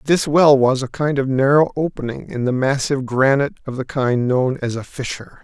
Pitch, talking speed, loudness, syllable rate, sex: 130 Hz, 210 wpm, -18 LUFS, 5.5 syllables/s, male